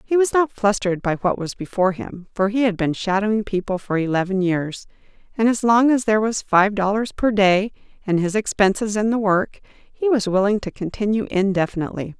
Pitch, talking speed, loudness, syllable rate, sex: 205 Hz, 195 wpm, -20 LUFS, 5.6 syllables/s, female